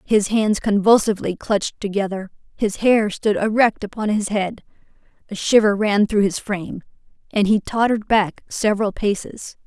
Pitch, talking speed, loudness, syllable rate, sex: 205 Hz, 150 wpm, -19 LUFS, 5.0 syllables/s, female